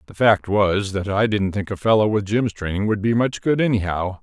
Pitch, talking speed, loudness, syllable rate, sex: 105 Hz, 240 wpm, -20 LUFS, 5.2 syllables/s, male